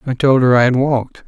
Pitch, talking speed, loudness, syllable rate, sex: 130 Hz, 285 wpm, -14 LUFS, 6.2 syllables/s, male